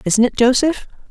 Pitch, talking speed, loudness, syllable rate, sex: 250 Hz, 165 wpm, -15 LUFS, 5.3 syllables/s, female